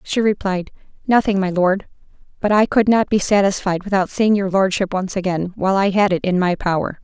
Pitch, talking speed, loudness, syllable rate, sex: 195 Hz, 205 wpm, -18 LUFS, 5.5 syllables/s, female